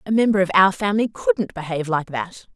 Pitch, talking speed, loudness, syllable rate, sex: 185 Hz, 210 wpm, -20 LUFS, 6.0 syllables/s, female